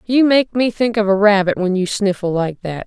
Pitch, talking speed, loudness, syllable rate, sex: 205 Hz, 250 wpm, -16 LUFS, 5.0 syllables/s, female